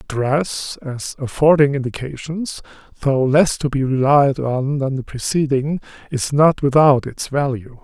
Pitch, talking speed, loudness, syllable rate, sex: 140 Hz, 140 wpm, -18 LUFS, 4.1 syllables/s, male